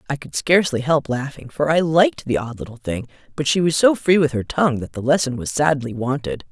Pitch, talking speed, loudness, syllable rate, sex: 140 Hz, 240 wpm, -19 LUFS, 5.8 syllables/s, female